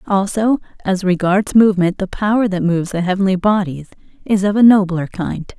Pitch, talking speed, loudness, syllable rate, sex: 195 Hz, 170 wpm, -16 LUFS, 5.5 syllables/s, female